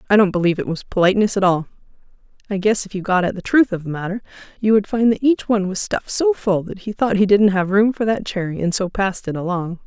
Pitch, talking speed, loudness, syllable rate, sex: 200 Hz, 270 wpm, -19 LUFS, 6.5 syllables/s, female